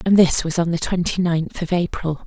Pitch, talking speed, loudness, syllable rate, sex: 170 Hz, 240 wpm, -20 LUFS, 5.1 syllables/s, female